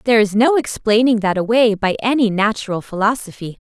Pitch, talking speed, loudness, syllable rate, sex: 220 Hz, 165 wpm, -16 LUFS, 5.8 syllables/s, female